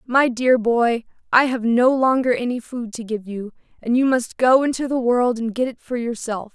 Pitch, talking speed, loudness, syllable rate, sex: 240 Hz, 220 wpm, -20 LUFS, 4.8 syllables/s, female